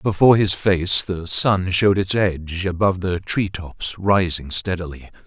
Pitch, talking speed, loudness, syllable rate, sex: 90 Hz, 160 wpm, -19 LUFS, 4.5 syllables/s, male